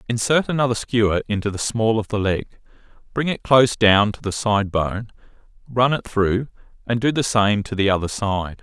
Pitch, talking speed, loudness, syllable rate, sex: 110 Hz, 195 wpm, -20 LUFS, 5.1 syllables/s, male